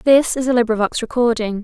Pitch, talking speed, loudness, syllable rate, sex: 235 Hz, 185 wpm, -17 LUFS, 6.1 syllables/s, female